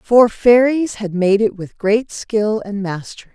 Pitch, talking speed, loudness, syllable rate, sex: 215 Hz, 180 wpm, -16 LUFS, 4.0 syllables/s, female